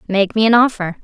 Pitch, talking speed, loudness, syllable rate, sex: 210 Hz, 235 wpm, -14 LUFS, 6.1 syllables/s, female